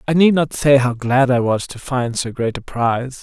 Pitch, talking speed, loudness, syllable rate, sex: 130 Hz, 260 wpm, -17 LUFS, 4.9 syllables/s, male